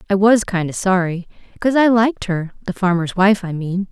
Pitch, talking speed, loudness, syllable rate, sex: 195 Hz, 200 wpm, -17 LUFS, 5.5 syllables/s, female